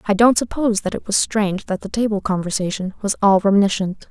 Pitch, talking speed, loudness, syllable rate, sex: 205 Hz, 205 wpm, -19 LUFS, 6.2 syllables/s, female